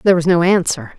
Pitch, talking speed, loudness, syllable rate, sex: 180 Hz, 245 wpm, -15 LUFS, 6.8 syllables/s, female